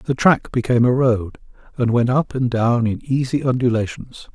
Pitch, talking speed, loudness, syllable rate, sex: 120 Hz, 180 wpm, -18 LUFS, 4.9 syllables/s, male